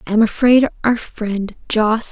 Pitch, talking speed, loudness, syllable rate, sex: 225 Hz, 170 wpm, -17 LUFS, 4.2 syllables/s, female